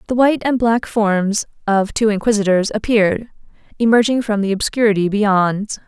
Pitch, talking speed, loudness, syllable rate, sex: 215 Hz, 145 wpm, -16 LUFS, 5.1 syllables/s, female